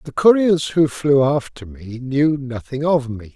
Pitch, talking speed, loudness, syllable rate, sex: 140 Hz, 180 wpm, -18 LUFS, 4.0 syllables/s, male